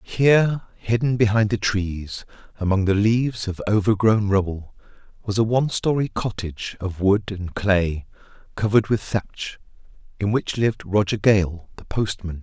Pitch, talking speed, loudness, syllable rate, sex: 105 Hz, 145 wpm, -22 LUFS, 4.7 syllables/s, male